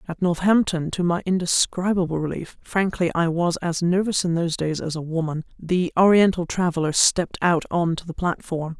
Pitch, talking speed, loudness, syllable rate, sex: 170 Hz, 175 wpm, -22 LUFS, 3.7 syllables/s, female